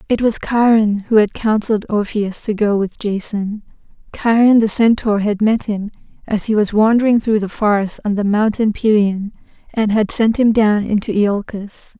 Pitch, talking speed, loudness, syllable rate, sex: 215 Hz, 175 wpm, -16 LUFS, 4.9 syllables/s, female